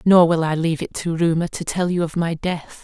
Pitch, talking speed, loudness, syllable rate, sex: 170 Hz, 275 wpm, -20 LUFS, 5.5 syllables/s, female